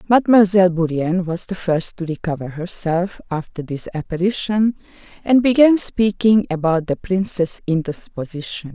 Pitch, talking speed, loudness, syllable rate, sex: 180 Hz, 125 wpm, -19 LUFS, 4.9 syllables/s, female